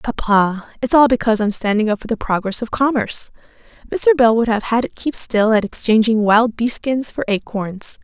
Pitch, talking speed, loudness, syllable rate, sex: 225 Hz, 200 wpm, -17 LUFS, 5.1 syllables/s, female